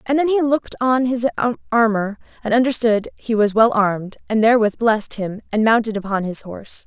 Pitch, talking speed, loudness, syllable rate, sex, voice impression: 225 Hz, 190 wpm, -18 LUFS, 5.6 syllables/s, female, very feminine, slightly adult-like, slightly clear, fluent, refreshing, friendly, slightly lively